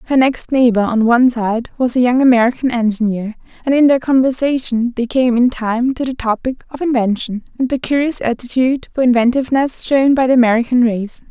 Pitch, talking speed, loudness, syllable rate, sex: 245 Hz, 185 wpm, -15 LUFS, 5.6 syllables/s, female